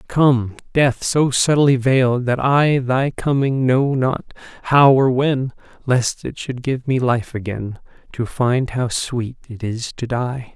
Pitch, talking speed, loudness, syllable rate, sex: 130 Hz, 165 wpm, -18 LUFS, 3.7 syllables/s, male